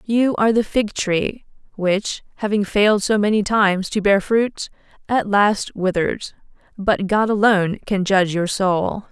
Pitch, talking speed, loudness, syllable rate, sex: 205 Hz, 160 wpm, -19 LUFS, 4.4 syllables/s, female